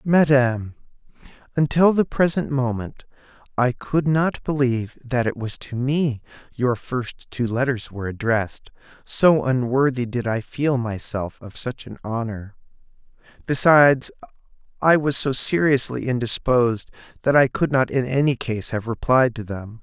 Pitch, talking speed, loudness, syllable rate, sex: 125 Hz, 140 wpm, -21 LUFS, 4.5 syllables/s, male